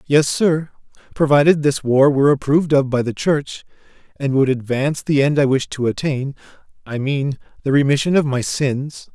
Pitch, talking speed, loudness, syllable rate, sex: 140 Hz, 170 wpm, -18 LUFS, 5.1 syllables/s, male